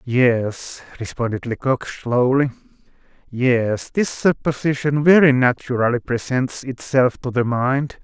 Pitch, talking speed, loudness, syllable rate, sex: 130 Hz, 105 wpm, -19 LUFS, 3.9 syllables/s, male